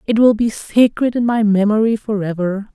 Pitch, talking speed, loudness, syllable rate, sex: 215 Hz, 175 wpm, -16 LUFS, 5.1 syllables/s, female